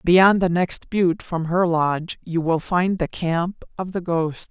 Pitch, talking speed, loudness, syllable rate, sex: 175 Hz, 200 wpm, -21 LUFS, 4.1 syllables/s, female